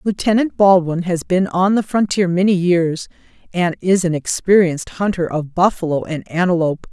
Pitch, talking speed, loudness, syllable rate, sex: 180 Hz, 155 wpm, -17 LUFS, 5.1 syllables/s, female